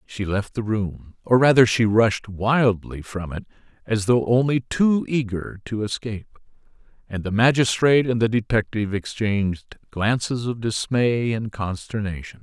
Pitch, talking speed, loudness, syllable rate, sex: 110 Hz, 135 wpm, -22 LUFS, 4.5 syllables/s, male